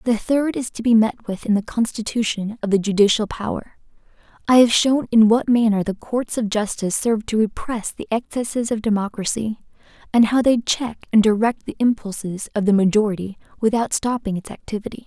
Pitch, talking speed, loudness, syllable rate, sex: 220 Hz, 185 wpm, -20 LUFS, 5.6 syllables/s, female